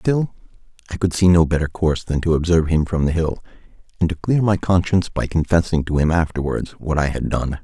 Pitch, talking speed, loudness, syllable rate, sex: 85 Hz, 220 wpm, -19 LUFS, 6.0 syllables/s, male